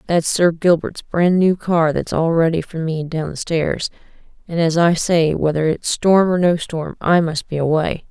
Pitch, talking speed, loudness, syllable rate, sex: 165 Hz, 205 wpm, -18 LUFS, 4.4 syllables/s, female